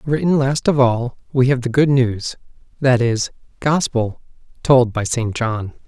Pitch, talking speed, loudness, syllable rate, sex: 125 Hz, 155 wpm, -18 LUFS, 4.1 syllables/s, male